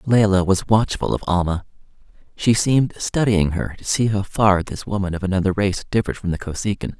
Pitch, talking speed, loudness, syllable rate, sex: 100 Hz, 190 wpm, -20 LUFS, 5.7 syllables/s, male